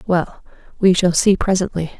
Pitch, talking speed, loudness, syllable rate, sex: 185 Hz, 150 wpm, -17 LUFS, 4.9 syllables/s, female